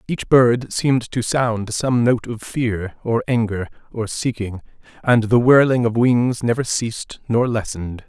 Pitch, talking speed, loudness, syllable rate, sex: 115 Hz, 165 wpm, -19 LUFS, 4.3 syllables/s, male